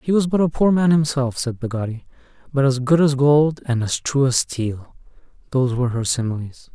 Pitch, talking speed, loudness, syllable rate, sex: 135 Hz, 195 wpm, -19 LUFS, 5.4 syllables/s, male